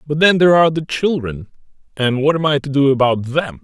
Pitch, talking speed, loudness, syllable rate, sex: 145 Hz, 230 wpm, -15 LUFS, 5.9 syllables/s, male